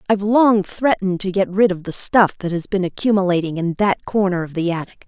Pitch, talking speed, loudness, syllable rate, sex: 190 Hz, 225 wpm, -18 LUFS, 5.8 syllables/s, female